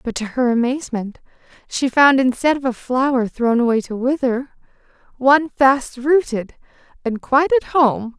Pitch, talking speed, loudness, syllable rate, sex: 255 Hz, 155 wpm, -18 LUFS, 4.8 syllables/s, female